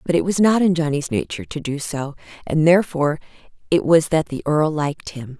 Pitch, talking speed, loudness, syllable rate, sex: 155 Hz, 210 wpm, -19 LUFS, 5.9 syllables/s, female